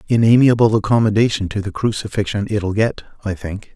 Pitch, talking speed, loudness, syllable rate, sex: 105 Hz, 160 wpm, -17 LUFS, 5.8 syllables/s, male